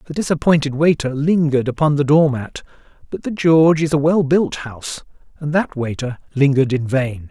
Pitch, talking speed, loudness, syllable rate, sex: 145 Hz, 180 wpm, -17 LUFS, 5.4 syllables/s, male